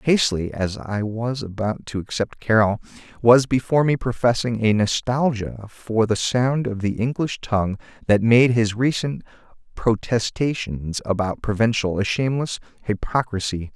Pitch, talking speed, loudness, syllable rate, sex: 115 Hz, 135 wpm, -21 LUFS, 4.6 syllables/s, male